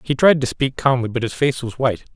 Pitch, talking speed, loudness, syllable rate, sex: 130 Hz, 280 wpm, -19 LUFS, 6.1 syllables/s, male